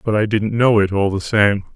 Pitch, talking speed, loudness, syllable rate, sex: 105 Hz, 275 wpm, -17 LUFS, 5.1 syllables/s, male